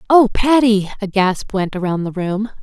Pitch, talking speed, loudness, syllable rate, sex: 205 Hz, 185 wpm, -17 LUFS, 4.6 syllables/s, female